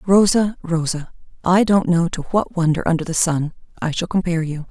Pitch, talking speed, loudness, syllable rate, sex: 175 Hz, 190 wpm, -19 LUFS, 5.3 syllables/s, female